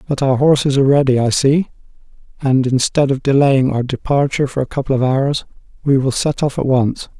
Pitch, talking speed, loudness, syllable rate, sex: 135 Hz, 200 wpm, -16 LUFS, 5.7 syllables/s, male